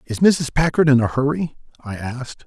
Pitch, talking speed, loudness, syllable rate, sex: 140 Hz, 195 wpm, -19 LUFS, 5.2 syllables/s, male